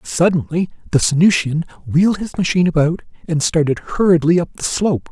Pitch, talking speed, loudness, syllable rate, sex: 165 Hz, 150 wpm, -17 LUFS, 5.8 syllables/s, male